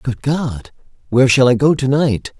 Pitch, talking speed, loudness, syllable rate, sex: 130 Hz, 200 wpm, -15 LUFS, 4.7 syllables/s, male